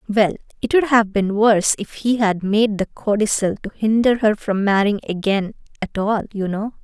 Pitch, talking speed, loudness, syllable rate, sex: 210 Hz, 195 wpm, -19 LUFS, 4.9 syllables/s, female